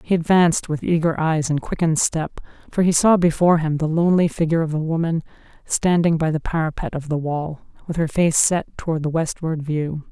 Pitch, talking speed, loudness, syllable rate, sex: 160 Hz, 200 wpm, -20 LUFS, 5.7 syllables/s, female